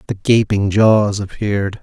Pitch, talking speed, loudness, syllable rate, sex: 100 Hz, 130 wpm, -15 LUFS, 4.2 syllables/s, male